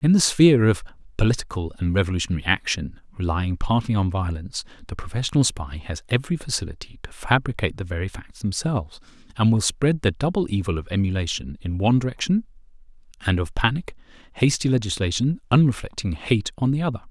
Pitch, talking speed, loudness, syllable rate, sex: 110 Hz, 160 wpm, -23 LUFS, 6.4 syllables/s, male